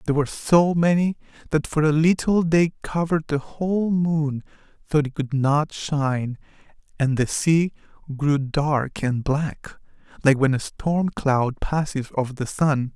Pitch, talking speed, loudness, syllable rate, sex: 150 Hz, 155 wpm, -22 LUFS, 4.3 syllables/s, male